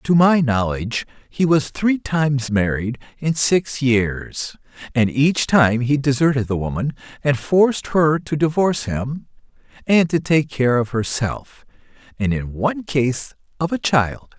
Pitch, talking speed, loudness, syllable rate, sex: 140 Hz, 155 wpm, -19 LUFS, 4.1 syllables/s, male